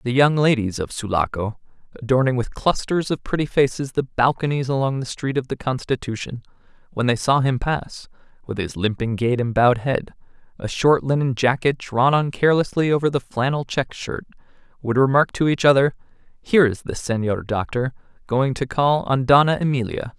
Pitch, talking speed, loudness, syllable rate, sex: 130 Hz, 175 wpm, -20 LUFS, 5.3 syllables/s, male